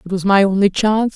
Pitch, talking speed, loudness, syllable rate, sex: 200 Hz, 260 wpm, -15 LUFS, 6.5 syllables/s, female